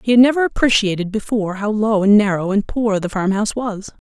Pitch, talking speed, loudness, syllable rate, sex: 210 Hz, 220 wpm, -17 LUFS, 5.9 syllables/s, female